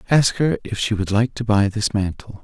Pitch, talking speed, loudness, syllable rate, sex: 110 Hz, 245 wpm, -20 LUFS, 5.1 syllables/s, male